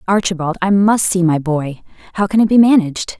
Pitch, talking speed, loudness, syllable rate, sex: 185 Hz, 205 wpm, -14 LUFS, 5.7 syllables/s, female